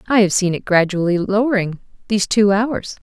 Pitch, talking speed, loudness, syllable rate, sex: 200 Hz, 155 wpm, -17 LUFS, 5.5 syllables/s, female